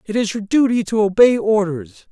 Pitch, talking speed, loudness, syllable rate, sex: 210 Hz, 200 wpm, -16 LUFS, 5.0 syllables/s, male